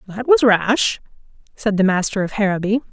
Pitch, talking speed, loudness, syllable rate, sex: 215 Hz, 165 wpm, -17 LUFS, 5.1 syllables/s, female